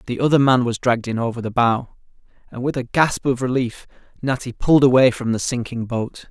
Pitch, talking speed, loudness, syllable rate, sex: 125 Hz, 210 wpm, -19 LUFS, 5.7 syllables/s, male